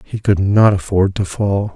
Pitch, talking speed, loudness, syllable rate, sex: 100 Hz, 205 wpm, -15 LUFS, 4.2 syllables/s, male